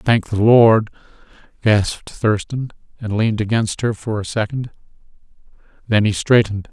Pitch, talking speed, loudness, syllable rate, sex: 110 Hz, 135 wpm, -17 LUFS, 4.9 syllables/s, male